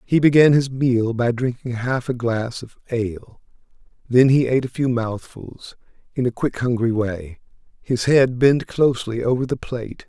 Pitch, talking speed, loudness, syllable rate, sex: 125 Hz, 175 wpm, -20 LUFS, 4.7 syllables/s, male